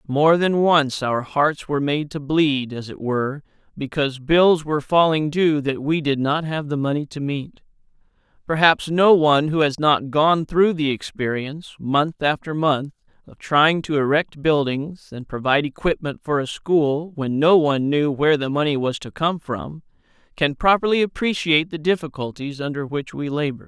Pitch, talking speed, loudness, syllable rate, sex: 150 Hz, 175 wpm, -20 LUFS, 4.8 syllables/s, male